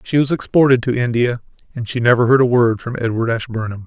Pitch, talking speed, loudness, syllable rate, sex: 120 Hz, 215 wpm, -16 LUFS, 6.1 syllables/s, male